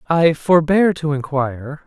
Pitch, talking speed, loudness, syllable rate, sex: 155 Hz, 130 wpm, -17 LUFS, 4.1 syllables/s, male